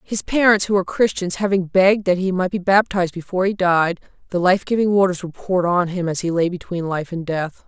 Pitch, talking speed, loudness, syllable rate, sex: 185 Hz, 235 wpm, -19 LUFS, 6.1 syllables/s, female